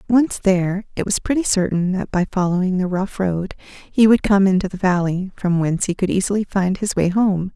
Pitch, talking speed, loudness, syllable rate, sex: 190 Hz, 215 wpm, -19 LUFS, 5.3 syllables/s, female